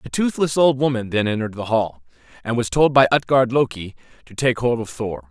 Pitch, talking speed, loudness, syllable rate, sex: 125 Hz, 215 wpm, -19 LUFS, 5.6 syllables/s, male